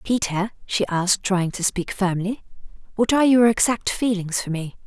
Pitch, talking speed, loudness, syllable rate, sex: 200 Hz, 175 wpm, -21 LUFS, 5.0 syllables/s, female